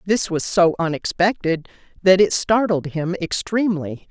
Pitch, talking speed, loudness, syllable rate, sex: 180 Hz, 130 wpm, -19 LUFS, 4.5 syllables/s, female